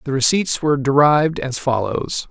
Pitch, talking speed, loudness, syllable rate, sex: 140 Hz, 155 wpm, -17 LUFS, 5.1 syllables/s, male